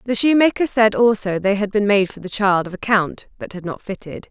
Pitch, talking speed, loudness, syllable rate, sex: 205 Hz, 250 wpm, -18 LUFS, 5.4 syllables/s, female